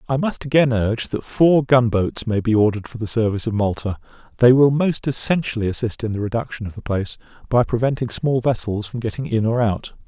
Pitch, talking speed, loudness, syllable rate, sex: 115 Hz, 215 wpm, -20 LUFS, 5.9 syllables/s, male